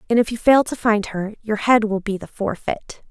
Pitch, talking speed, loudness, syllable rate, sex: 215 Hz, 250 wpm, -20 LUFS, 5.1 syllables/s, female